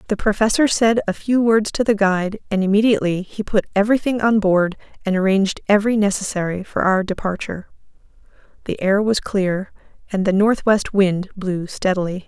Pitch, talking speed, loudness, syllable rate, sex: 200 Hz, 155 wpm, -19 LUFS, 5.6 syllables/s, female